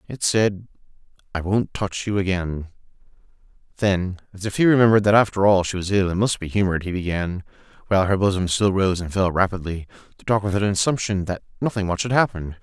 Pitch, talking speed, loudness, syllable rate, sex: 95 Hz, 195 wpm, -21 LUFS, 6.2 syllables/s, male